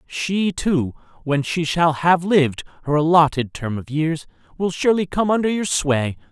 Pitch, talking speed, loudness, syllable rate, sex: 160 Hz, 170 wpm, -20 LUFS, 4.6 syllables/s, male